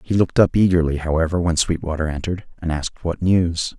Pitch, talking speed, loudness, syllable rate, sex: 85 Hz, 190 wpm, -20 LUFS, 6.1 syllables/s, male